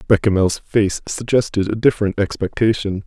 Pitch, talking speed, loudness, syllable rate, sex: 100 Hz, 115 wpm, -18 LUFS, 5.2 syllables/s, male